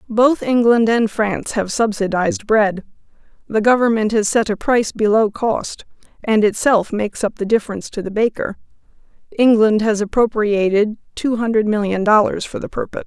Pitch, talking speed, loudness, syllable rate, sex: 215 Hz, 155 wpm, -17 LUFS, 5.3 syllables/s, female